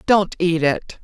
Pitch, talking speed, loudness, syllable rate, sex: 175 Hz, 175 wpm, -19 LUFS, 3.4 syllables/s, female